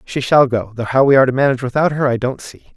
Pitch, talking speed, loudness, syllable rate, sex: 130 Hz, 305 wpm, -15 LUFS, 7.1 syllables/s, male